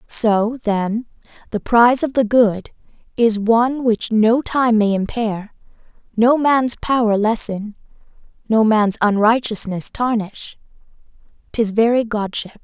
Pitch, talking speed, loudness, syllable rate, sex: 225 Hz, 120 wpm, -17 LUFS, 3.9 syllables/s, female